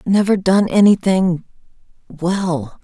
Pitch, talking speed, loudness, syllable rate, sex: 185 Hz, 65 wpm, -16 LUFS, 3.4 syllables/s, female